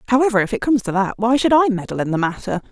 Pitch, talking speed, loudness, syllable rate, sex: 225 Hz, 290 wpm, -18 LUFS, 7.4 syllables/s, female